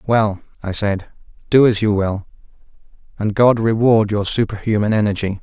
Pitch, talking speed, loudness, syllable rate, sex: 105 Hz, 145 wpm, -17 LUFS, 5.0 syllables/s, male